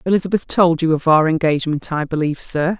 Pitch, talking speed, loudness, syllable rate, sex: 165 Hz, 195 wpm, -17 LUFS, 6.4 syllables/s, female